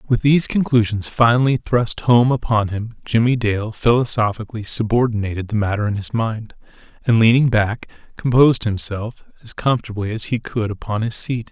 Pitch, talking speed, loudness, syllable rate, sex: 110 Hz, 155 wpm, -18 LUFS, 5.3 syllables/s, male